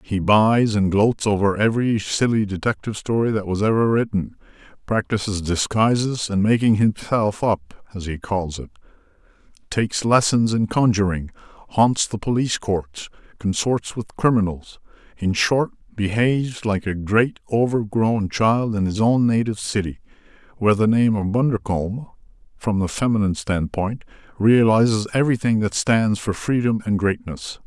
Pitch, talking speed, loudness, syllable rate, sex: 105 Hz, 130 wpm, -20 LUFS, 4.9 syllables/s, male